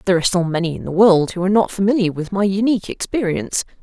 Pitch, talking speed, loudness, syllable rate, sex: 190 Hz, 235 wpm, -18 LUFS, 7.4 syllables/s, female